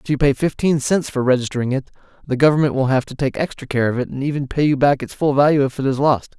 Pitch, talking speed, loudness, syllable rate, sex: 135 Hz, 290 wpm, -18 LUFS, 6.7 syllables/s, male